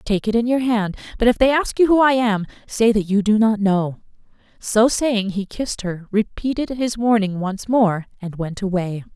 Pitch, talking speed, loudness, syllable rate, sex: 215 Hz, 210 wpm, -19 LUFS, 4.8 syllables/s, female